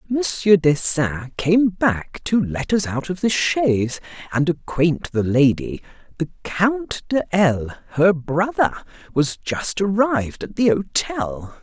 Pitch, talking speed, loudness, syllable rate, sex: 170 Hz, 140 wpm, -20 LUFS, 3.5 syllables/s, male